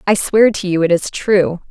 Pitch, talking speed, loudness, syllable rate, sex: 190 Hz, 245 wpm, -14 LUFS, 4.6 syllables/s, female